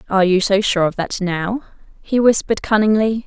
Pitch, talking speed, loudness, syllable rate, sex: 205 Hz, 185 wpm, -17 LUFS, 5.6 syllables/s, female